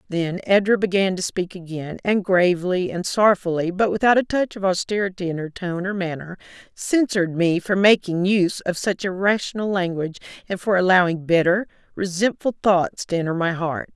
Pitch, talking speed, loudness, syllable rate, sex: 185 Hz, 170 wpm, -21 LUFS, 5.4 syllables/s, female